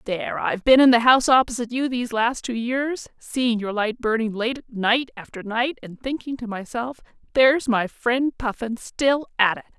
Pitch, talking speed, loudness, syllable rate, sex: 240 Hz, 190 wpm, -22 LUFS, 5.0 syllables/s, female